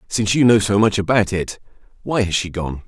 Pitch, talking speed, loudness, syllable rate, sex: 100 Hz, 230 wpm, -18 LUFS, 5.7 syllables/s, male